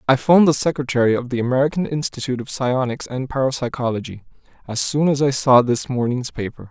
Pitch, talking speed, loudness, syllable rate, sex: 130 Hz, 180 wpm, -19 LUFS, 6.2 syllables/s, male